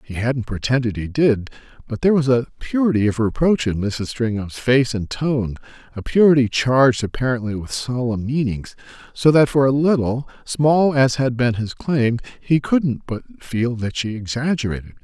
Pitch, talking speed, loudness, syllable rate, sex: 125 Hz, 170 wpm, -19 LUFS, 4.8 syllables/s, male